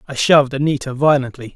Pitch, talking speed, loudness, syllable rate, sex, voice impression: 135 Hz, 155 wpm, -16 LUFS, 6.5 syllables/s, male, very masculine, very adult-like, very middle-aged, thick, slightly tensed, powerful, bright, hard, slightly clear, fluent, slightly cool, intellectual, very sincere, slightly calm, mature, slightly friendly, reassuring, slightly unique, slightly wild, slightly lively, slightly kind, slightly intense, slightly modest